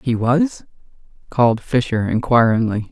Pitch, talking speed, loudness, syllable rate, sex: 120 Hz, 105 wpm, -17 LUFS, 4.5 syllables/s, male